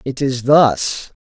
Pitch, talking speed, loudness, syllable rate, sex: 130 Hz, 145 wpm, -15 LUFS, 2.9 syllables/s, male